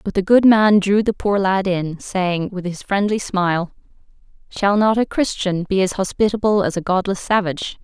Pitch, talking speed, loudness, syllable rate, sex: 195 Hz, 190 wpm, -18 LUFS, 4.9 syllables/s, female